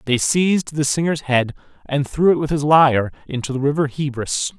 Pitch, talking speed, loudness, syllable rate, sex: 145 Hz, 195 wpm, -19 LUFS, 5.3 syllables/s, male